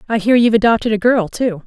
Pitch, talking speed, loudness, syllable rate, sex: 220 Hz, 250 wpm, -14 LUFS, 6.8 syllables/s, female